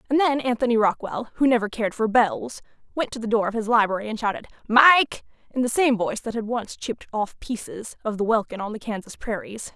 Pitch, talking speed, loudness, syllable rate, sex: 225 Hz, 220 wpm, -23 LUFS, 5.9 syllables/s, female